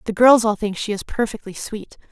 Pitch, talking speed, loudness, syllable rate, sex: 215 Hz, 225 wpm, -19 LUFS, 5.4 syllables/s, female